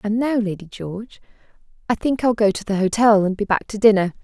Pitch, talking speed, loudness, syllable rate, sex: 210 Hz, 225 wpm, -19 LUFS, 5.9 syllables/s, female